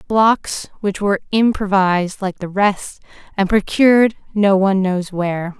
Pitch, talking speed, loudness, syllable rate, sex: 195 Hz, 140 wpm, -17 LUFS, 4.5 syllables/s, female